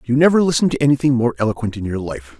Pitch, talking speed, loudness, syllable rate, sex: 125 Hz, 250 wpm, -17 LUFS, 7.6 syllables/s, male